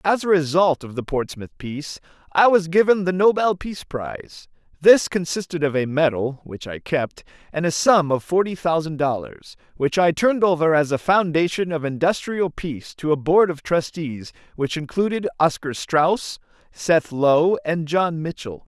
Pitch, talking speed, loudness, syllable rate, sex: 165 Hz, 170 wpm, -20 LUFS, 4.7 syllables/s, male